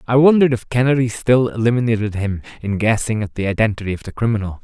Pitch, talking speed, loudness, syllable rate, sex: 115 Hz, 195 wpm, -18 LUFS, 6.7 syllables/s, male